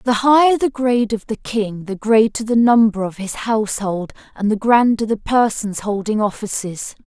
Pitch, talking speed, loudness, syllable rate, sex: 220 Hz, 180 wpm, -17 LUFS, 4.8 syllables/s, female